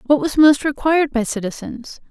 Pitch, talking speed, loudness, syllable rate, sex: 270 Hz, 170 wpm, -17 LUFS, 5.3 syllables/s, female